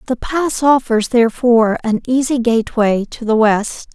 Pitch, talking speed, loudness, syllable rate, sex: 235 Hz, 150 wpm, -15 LUFS, 4.7 syllables/s, female